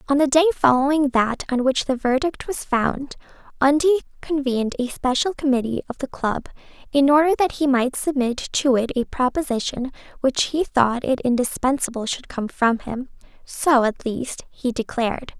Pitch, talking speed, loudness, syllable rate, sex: 265 Hz, 170 wpm, -21 LUFS, 4.9 syllables/s, female